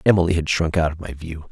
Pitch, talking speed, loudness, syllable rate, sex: 80 Hz, 275 wpm, -21 LUFS, 6.4 syllables/s, male